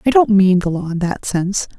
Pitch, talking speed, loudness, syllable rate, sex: 195 Hz, 270 wpm, -16 LUFS, 5.7 syllables/s, female